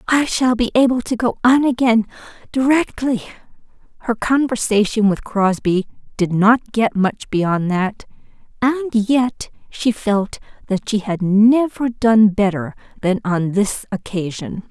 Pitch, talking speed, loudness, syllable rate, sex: 220 Hz, 130 wpm, -17 LUFS, 4.1 syllables/s, female